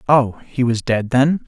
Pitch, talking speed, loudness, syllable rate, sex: 125 Hz, 205 wpm, -18 LUFS, 4.0 syllables/s, male